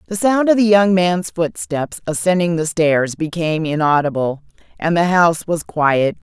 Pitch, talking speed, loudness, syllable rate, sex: 170 Hz, 160 wpm, -17 LUFS, 4.7 syllables/s, female